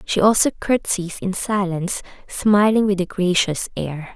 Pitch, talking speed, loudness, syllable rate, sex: 190 Hz, 145 wpm, -20 LUFS, 4.4 syllables/s, female